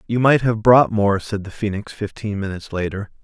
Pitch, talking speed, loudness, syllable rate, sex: 105 Hz, 205 wpm, -19 LUFS, 5.4 syllables/s, male